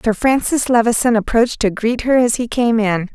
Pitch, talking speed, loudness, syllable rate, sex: 230 Hz, 210 wpm, -16 LUFS, 5.3 syllables/s, female